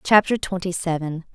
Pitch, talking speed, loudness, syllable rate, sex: 175 Hz, 135 wpm, -22 LUFS, 5.1 syllables/s, female